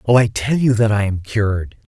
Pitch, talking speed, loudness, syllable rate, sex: 110 Hz, 250 wpm, -17 LUFS, 5.4 syllables/s, male